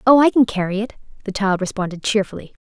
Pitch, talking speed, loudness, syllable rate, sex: 210 Hz, 205 wpm, -19 LUFS, 6.5 syllables/s, female